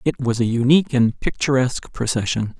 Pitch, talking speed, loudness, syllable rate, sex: 125 Hz, 160 wpm, -19 LUFS, 5.6 syllables/s, male